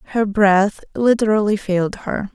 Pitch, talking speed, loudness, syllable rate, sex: 205 Hz, 130 wpm, -18 LUFS, 4.6 syllables/s, female